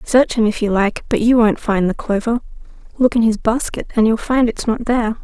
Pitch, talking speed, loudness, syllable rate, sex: 225 Hz, 240 wpm, -17 LUFS, 5.4 syllables/s, female